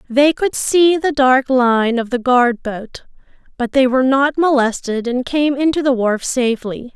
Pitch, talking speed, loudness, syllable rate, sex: 260 Hz, 180 wpm, -15 LUFS, 4.3 syllables/s, female